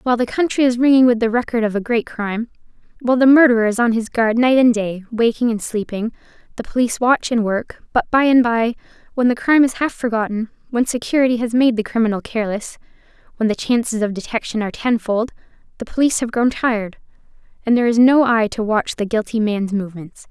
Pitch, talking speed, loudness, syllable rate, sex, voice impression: 230 Hz, 195 wpm, -17 LUFS, 6.2 syllables/s, female, very feminine, young, very thin, tensed, slightly weak, very bright, slightly soft, very clear, very fluent, slightly raspy, very cute, intellectual, very refreshing, sincere, slightly calm, very friendly, very reassuring, very unique, elegant, slightly wild, sweet, very lively, slightly kind, slightly intense, slightly sharp, slightly modest, very light